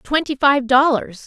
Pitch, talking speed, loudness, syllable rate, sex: 270 Hz, 140 wpm, -16 LUFS, 4.1 syllables/s, female